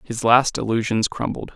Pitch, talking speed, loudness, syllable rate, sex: 115 Hz, 155 wpm, -20 LUFS, 4.9 syllables/s, male